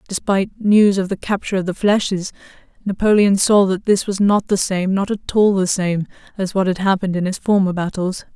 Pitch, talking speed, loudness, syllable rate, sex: 195 Hz, 210 wpm, -17 LUFS, 5.5 syllables/s, female